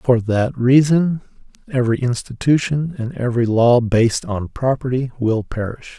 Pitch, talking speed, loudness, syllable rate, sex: 125 Hz, 130 wpm, -18 LUFS, 4.7 syllables/s, male